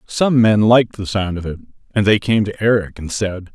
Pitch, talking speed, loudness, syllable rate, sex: 105 Hz, 235 wpm, -17 LUFS, 5.4 syllables/s, male